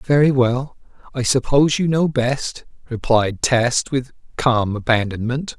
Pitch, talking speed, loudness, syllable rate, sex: 125 Hz, 130 wpm, -18 LUFS, 4.1 syllables/s, male